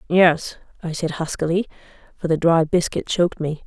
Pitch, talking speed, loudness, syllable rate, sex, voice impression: 165 Hz, 165 wpm, -21 LUFS, 5.2 syllables/s, female, very feminine, slightly young, thin, tensed, slightly powerful, bright, soft, very clear, very fluent, slightly raspy, very cute, intellectual, very refreshing, sincere, calm, very friendly, very reassuring, unique, elegant, slightly wild, very sweet, lively, kind, slightly modest, light